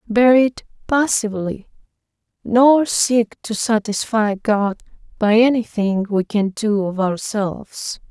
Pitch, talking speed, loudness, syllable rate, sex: 220 Hz, 110 wpm, -18 LUFS, 3.7 syllables/s, female